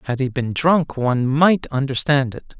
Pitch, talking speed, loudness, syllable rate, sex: 140 Hz, 185 wpm, -19 LUFS, 4.6 syllables/s, male